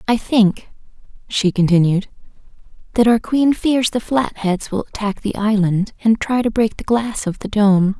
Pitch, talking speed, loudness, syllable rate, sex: 215 Hz, 175 wpm, -17 LUFS, 4.4 syllables/s, female